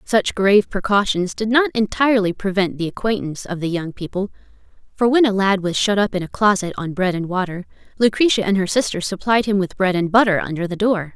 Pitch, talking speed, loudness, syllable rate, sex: 200 Hz, 215 wpm, -19 LUFS, 5.9 syllables/s, female